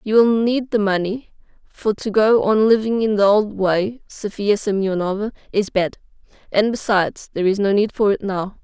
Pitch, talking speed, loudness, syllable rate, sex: 205 Hz, 190 wpm, -19 LUFS, 4.9 syllables/s, female